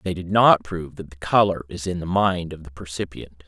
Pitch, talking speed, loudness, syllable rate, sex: 85 Hz, 240 wpm, -21 LUFS, 5.4 syllables/s, male